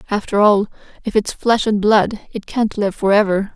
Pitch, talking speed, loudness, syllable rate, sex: 205 Hz, 200 wpm, -17 LUFS, 4.8 syllables/s, female